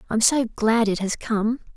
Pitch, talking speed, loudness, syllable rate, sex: 225 Hz, 205 wpm, -22 LUFS, 4.5 syllables/s, female